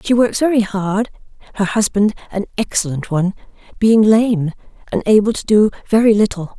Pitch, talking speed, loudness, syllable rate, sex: 210 Hz, 155 wpm, -16 LUFS, 4.6 syllables/s, female